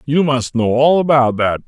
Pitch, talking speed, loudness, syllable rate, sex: 135 Hz, 215 wpm, -14 LUFS, 4.6 syllables/s, male